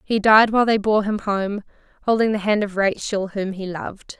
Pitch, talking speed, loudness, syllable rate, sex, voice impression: 205 Hz, 215 wpm, -20 LUFS, 5.2 syllables/s, female, feminine, adult-like, tensed, powerful, bright, clear, fluent, intellectual, friendly, reassuring, lively, slightly sharp, light